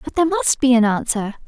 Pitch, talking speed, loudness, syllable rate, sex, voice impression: 245 Hz, 245 wpm, -17 LUFS, 6.3 syllables/s, female, feminine, slightly adult-like, clear, sincere, slightly friendly, slightly kind